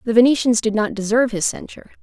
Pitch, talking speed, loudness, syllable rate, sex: 225 Hz, 205 wpm, -18 LUFS, 7.2 syllables/s, female